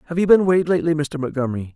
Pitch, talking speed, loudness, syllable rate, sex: 155 Hz, 240 wpm, -19 LUFS, 8.5 syllables/s, male